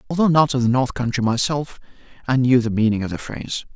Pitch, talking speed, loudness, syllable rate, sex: 125 Hz, 225 wpm, -20 LUFS, 6.3 syllables/s, male